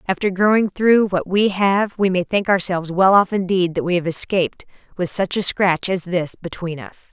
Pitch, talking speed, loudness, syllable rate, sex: 185 Hz, 210 wpm, -18 LUFS, 4.8 syllables/s, female